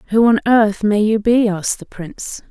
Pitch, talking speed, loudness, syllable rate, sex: 215 Hz, 215 wpm, -15 LUFS, 5.1 syllables/s, female